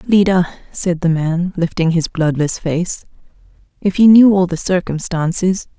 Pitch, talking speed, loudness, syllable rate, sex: 175 Hz, 145 wpm, -15 LUFS, 4.4 syllables/s, female